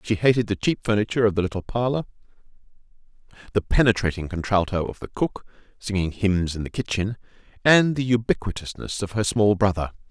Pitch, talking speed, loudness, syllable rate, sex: 105 Hz, 160 wpm, -23 LUFS, 6.0 syllables/s, male